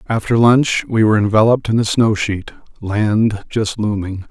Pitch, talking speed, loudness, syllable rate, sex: 110 Hz, 165 wpm, -16 LUFS, 4.8 syllables/s, male